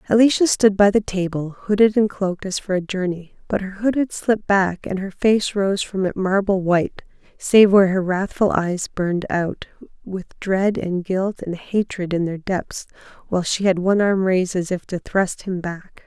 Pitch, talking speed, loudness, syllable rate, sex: 190 Hz, 200 wpm, -20 LUFS, 4.8 syllables/s, female